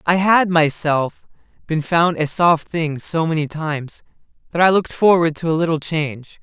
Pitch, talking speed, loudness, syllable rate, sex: 160 Hz, 180 wpm, -18 LUFS, 4.8 syllables/s, male